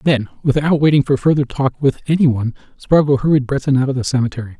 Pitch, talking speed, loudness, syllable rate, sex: 135 Hz, 210 wpm, -16 LUFS, 6.8 syllables/s, male